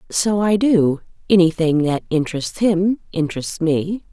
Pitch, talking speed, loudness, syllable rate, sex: 175 Hz, 130 wpm, -18 LUFS, 4.4 syllables/s, female